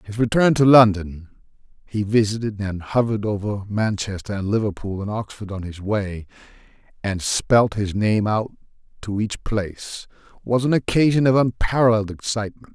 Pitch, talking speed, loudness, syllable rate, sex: 105 Hz, 135 wpm, -21 LUFS, 5.1 syllables/s, male